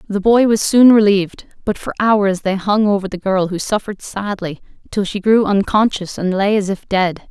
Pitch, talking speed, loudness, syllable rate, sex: 200 Hz, 205 wpm, -16 LUFS, 5.0 syllables/s, female